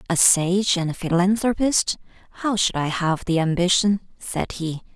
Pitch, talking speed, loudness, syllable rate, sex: 185 Hz, 155 wpm, -21 LUFS, 4.5 syllables/s, female